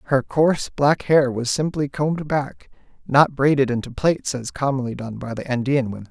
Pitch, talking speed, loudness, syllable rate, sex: 135 Hz, 185 wpm, -21 LUFS, 5.1 syllables/s, male